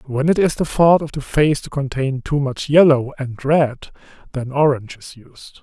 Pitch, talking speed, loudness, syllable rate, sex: 140 Hz, 205 wpm, -18 LUFS, 4.6 syllables/s, male